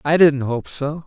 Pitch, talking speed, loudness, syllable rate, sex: 145 Hz, 225 wpm, -19 LUFS, 4.1 syllables/s, male